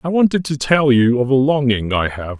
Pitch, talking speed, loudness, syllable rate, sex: 135 Hz, 250 wpm, -16 LUFS, 5.1 syllables/s, male